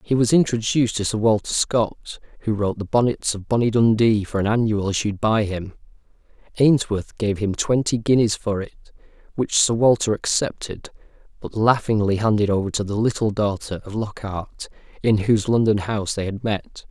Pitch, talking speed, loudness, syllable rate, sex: 110 Hz, 170 wpm, -21 LUFS, 5.1 syllables/s, male